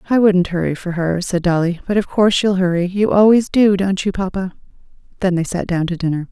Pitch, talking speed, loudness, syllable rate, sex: 185 Hz, 230 wpm, -17 LUFS, 5.8 syllables/s, female